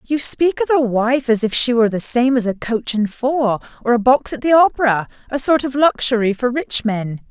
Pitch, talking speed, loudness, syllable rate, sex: 245 Hz, 230 wpm, -17 LUFS, 5.2 syllables/s, female